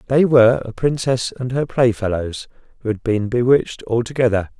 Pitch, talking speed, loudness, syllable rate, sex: 120 Hz, 170 wpm, -18 LUFS, 5.4 syllables/s, male